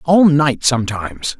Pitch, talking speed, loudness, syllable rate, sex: 135 Hz, 130 wpm, -15 LUFS, 4.7 syllables/s, male